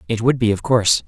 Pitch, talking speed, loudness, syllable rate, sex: 115 Hz, 280 wpm, -17 LUFS, 6.7 syllables/s, male